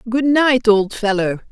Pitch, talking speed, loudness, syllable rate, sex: 225 Hz, 160 wpm, -16 LUFS, 4.0 syllables/s, female